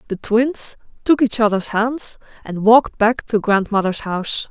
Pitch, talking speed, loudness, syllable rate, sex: 220 Hz, 160 wpm, -18 LUFS, 4.5 syllables/s, female